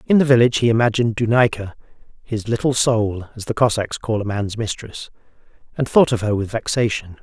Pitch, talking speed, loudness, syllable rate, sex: 115 Hz, 185 wpm, -19 LUFS, 5.8 syllables/s, male